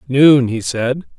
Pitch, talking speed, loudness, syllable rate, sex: 130 Hz, 150 wpm, -14 LUFS, 3.4 syllables/s, male